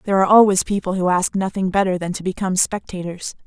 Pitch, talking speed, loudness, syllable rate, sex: 190 Hz, 210 wpm, -18 LUFS, 6.8 syllables/s, female